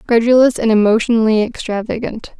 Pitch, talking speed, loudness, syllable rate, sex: 225 Hz, 100 wpm, -14 LUFS, 6.0 syllables/s, female